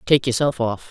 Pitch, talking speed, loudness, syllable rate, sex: 125 Hz, 200 wpm, -20 LUFS, 5.1 syllables/s, female